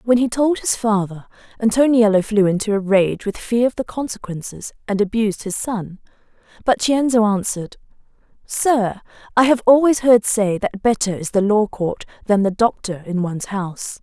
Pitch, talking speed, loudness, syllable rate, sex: 215 Hz, 170 wpm, -18 LUFS, 5.0 syllables/s, female